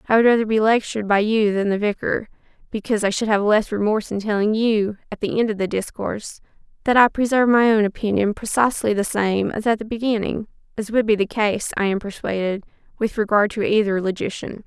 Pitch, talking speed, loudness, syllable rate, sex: 210 Hz, 205 wpm, -20 LUFS, 6.0 syllables/s, female